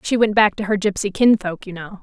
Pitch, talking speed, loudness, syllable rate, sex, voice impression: 200 Hz, 265 wpm, -18 LUFS, 5.7 syllables/s, female, feminine, young, tensed, powerful, slightly bright, clear, fluent, slightly nasal, intellectual, friendly, slightly unique, lively, slightly kind